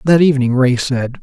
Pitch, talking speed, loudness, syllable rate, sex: 135 Hz, 195 wpm, -14 LUFS, 5.7 syllables/s, male